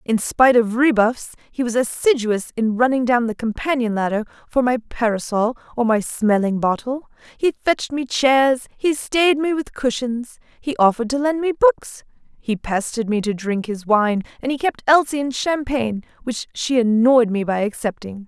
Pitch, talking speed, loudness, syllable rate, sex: 245 Hz, 175 wpm, -19 LUFS, 4.8 syllables/s, female